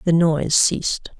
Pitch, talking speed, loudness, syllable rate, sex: 165 Hz, 150 wpm, -18 LUFS, 5.0 syllables/s, female